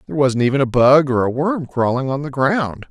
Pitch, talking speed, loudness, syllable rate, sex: 135 Hz, 250 wpm, -17 LUFS, 5.5 syllables/s, male